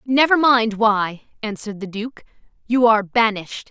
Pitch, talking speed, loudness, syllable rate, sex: 220 Hz, 145 wpm, -18 LUFS, 5.1 syllables/s, female